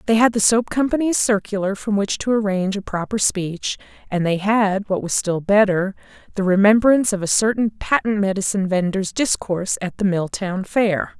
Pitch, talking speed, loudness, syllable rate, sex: 200 Hz, 175 wpm, -19 LUFS, 5.2 syllables/s, female